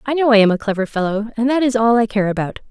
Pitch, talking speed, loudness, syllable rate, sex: 225 Hz, 310 wpm, -16 LUFS, 7.0 syllables/s, female